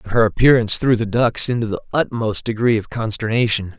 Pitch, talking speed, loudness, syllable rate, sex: 115 Hz, 190 wpm, -18 LUFS, 5.9 syllables/s, male